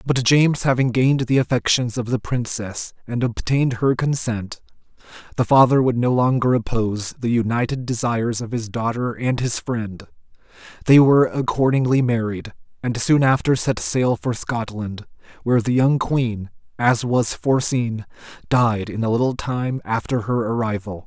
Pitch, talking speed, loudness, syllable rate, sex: 120 Hz, 155 wpm, -20 LUFS, 4.8 syllables/s, male